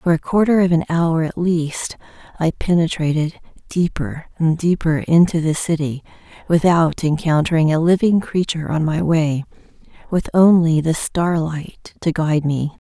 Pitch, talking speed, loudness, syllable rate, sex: 165 Hz, 140 wpm, -18 LUFS, 4.6 syllables/s, female